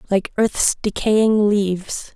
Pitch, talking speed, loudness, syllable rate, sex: 205 Hz, 110 wpm, -18 LUFS, 3.3 syllables/s, female